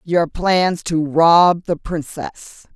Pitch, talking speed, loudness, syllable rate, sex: 165 Hz, 130 wpm, -16 LUFS, 2.7 syllables/s, female